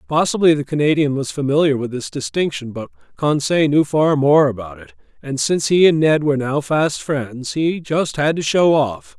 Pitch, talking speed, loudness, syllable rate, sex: 150 Hz, 195 wpm, -17 LUFS, 5.0 syllables/s, male